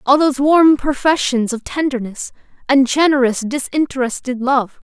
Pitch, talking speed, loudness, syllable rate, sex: 265 Hz, 120 wpm, -16 LUFS, 4.8 syllables/s, female